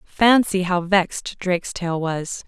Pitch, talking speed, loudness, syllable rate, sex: 185 Hz, 120 wpm, -20 LUFS, 3.9 syllables/s, female